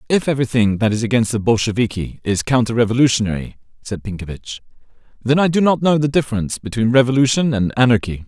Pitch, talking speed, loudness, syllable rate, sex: 115 Hz, 165 wpm, -17 LUFS, 6.6 syllables/s, male